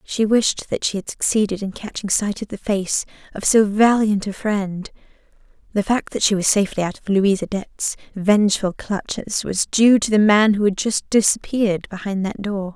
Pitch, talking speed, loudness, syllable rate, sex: 205 Hz, 195 wpm, -19 LUFS, 4.9 syllables/s, female